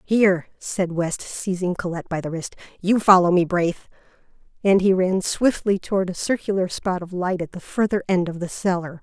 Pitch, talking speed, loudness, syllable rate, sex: 185 Hz, 195 wpm, -22 LUFS, 5.2 syllables/s, female